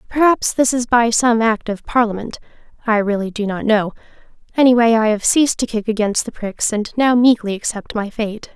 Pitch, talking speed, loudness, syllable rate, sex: 225 Hz, 190 wpm, -17 LUFS, 5.3 syllables/s, female